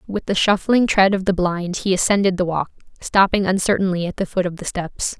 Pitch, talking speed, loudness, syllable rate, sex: 190 Hz, 220 wpm, -19 LUFS, 5.5 syllables/s, female